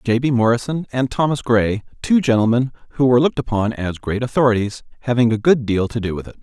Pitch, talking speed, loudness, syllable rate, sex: 120 Hz, 215 wpm, -18 LUFS, 6.3 syllables/s, male